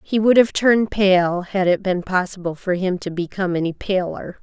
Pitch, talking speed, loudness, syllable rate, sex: 190 Hz, 205 wpm, -19 LUFS, 5.1 syllables/s, female